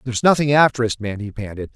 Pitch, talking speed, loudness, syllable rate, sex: 120 Hz, 240 wpm, -18 LUFS, 6.8 syllables/s, male